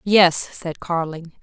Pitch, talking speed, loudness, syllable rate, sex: 170 Hz, 125 wpm, -20 LUFS, 3.2 syllables/s, female